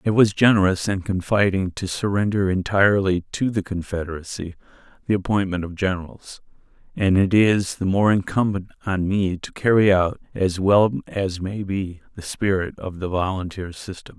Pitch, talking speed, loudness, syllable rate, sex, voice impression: 95 Hz, 155 wpm, -21 LUFS, 4.9 syllables/s, male, very masculine, very adult-like, slightly old, very thick, slightly tensed, powerful, slightly bright, slightly hard, muffled, slightly fluent, raspy, very cool, intellectual, very sincere, very calm, very mature, friendly, reassuring, unique, elegant, wild, sweet, slightly lively, slightly strict, slightly modest